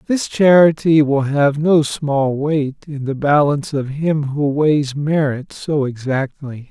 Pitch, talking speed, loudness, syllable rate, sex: 145 Hz, 150 wpm, -17 LUFS, 3.7 syllables/s, male